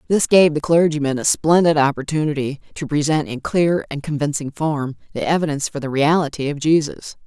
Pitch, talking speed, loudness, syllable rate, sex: 150 Hz, 175 wpm, -19 LUFS, 5.6 syllables/s, female